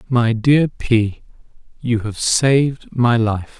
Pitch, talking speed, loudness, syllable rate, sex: 120 Hz, 135 wpm, -17 LUFS, 3.3 syllables/s, male